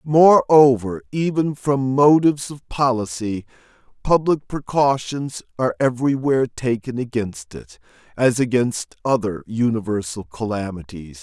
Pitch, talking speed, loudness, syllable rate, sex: 125 Hz, 95 wpm, -19 LUFS, 4.4 syllables/s, male